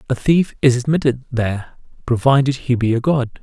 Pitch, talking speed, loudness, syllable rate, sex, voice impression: 130 Hz, 175 wpm, -17 LUFS, 5.2 syllables/s, male, masculine, adult-like, slightly muffled, sincere, calm, slightly modest